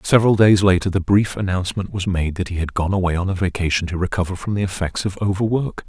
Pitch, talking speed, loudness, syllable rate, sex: 95 Hz, 235 wpm, -19 LUFS, 6.5 syllables/s, male